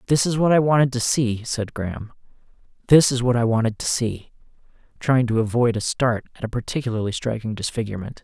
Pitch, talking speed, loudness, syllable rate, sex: 120 Hz, 190 wpm, -21 LUFS, 6.0 syllables/s, male